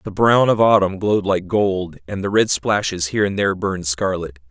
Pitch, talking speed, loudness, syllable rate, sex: 95 Hz, 215 wpm, -18 LUFS, 5.6 syllables/s, male